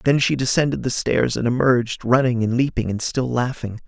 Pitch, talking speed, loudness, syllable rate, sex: 125 Hz, 200 wpm, -20 LUFS, 5.4 syllables/s, male